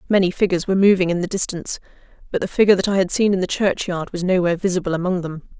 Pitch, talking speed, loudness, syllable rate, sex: 185 Hz, 235 wpm, -19 LUFS, 7.7 syllables/s, female